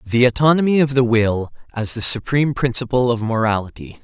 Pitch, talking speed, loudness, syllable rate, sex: 125 Hz, 165 wpm, -18 LUFS, 5.7 syllables/s, male